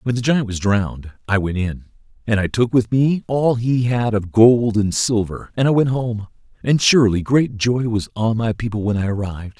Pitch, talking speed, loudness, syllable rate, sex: 115 Hz, 220 wpm, -18 LUFS, 5.0 syllables/s, male